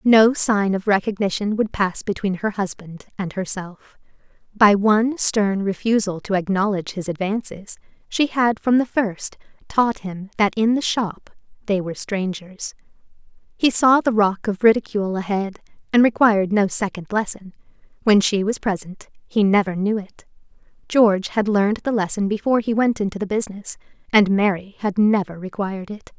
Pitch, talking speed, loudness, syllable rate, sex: 205 Hz, 160 wpm, -20 LUFS, 5.0 syllables/s, female